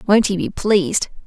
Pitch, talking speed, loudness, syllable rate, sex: 195 Hz, 190 wpm, -18 LUFS, 5.2 syllables/s, female